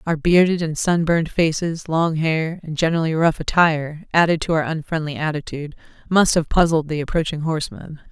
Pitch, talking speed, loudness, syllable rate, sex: 160 Hz, 170 wpm, -20 LUFS, 5.7 syllables/s, female